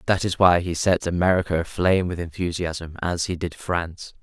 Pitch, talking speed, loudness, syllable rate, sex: 90 Hz, 185 wpm, -23 LUFS, 5.3 syllables/s, male